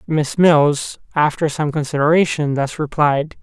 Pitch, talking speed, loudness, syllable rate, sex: 150 Hz, 120 wpm, -17 LUFS, 4.2 syllables/s, male